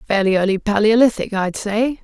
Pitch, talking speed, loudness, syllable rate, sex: 210 Hz, 145 wpm, -17 LUFS, 5.2 syllables/s, female